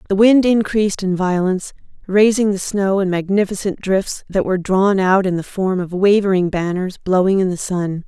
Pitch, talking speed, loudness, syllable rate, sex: 190 Hz, 185 wpm, -17 LUFS, 5.1 syllables/s, female